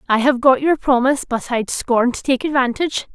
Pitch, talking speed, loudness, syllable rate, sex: 260 Hz, 210 wpm, -17 LUFS, 5.6 syllables/s, female